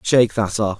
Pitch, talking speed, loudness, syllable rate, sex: 110 Hz, 225 wpm, -18 LUFS, 5.4 syllables/s, male